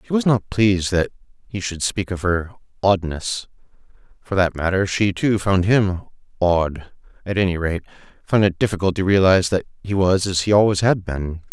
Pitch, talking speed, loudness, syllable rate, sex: 95 Hz, 175 wpm, -20 LUFS, 5.1 syllables/s, male